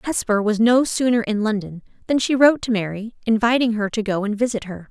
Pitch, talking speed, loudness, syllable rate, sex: 220 Hz, 220 wpm, -20 LUFS, 5.9 syllables/s, female